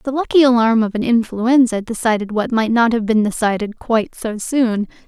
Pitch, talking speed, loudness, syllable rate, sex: 230 Hz, 190 wpm, -17 LUFS, 5.2 syllables/s, female